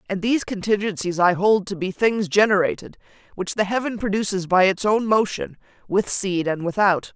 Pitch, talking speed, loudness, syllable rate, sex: 200 Hz, 175 wpm, -21 LUFS, 5.3 syllables/s, female